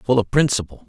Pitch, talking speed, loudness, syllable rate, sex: 120 Hz, 205 wpm, -19 LUFS, 6.1 syllables/s, male